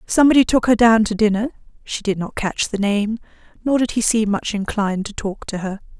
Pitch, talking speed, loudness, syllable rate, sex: 215 Hz, 220 wpm, -19 LUFS, 5.7 syllables/s, female